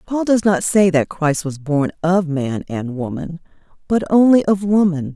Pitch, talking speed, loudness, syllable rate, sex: 175 Hz, 185 wpm, -17 LUFS, 4.3 syllables/s, female